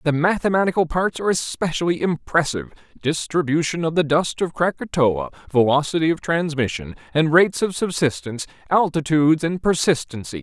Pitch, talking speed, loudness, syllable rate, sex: 155 Hz, 125 wpm, -20 LUFS, 5.6 syllables/s, male